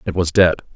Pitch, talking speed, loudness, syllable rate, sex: 85 Hz, 235 wpm, -16 LUFS, 6.7 syllables/s, male